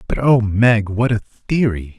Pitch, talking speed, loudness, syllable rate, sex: 110 Hz, 180 wpm, -17 LUFS, 3.9 syllables/s, male